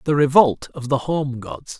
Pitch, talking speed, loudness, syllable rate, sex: 135 Hz, 200 wpm, -19 LUFS, 4.4 syllables/s, male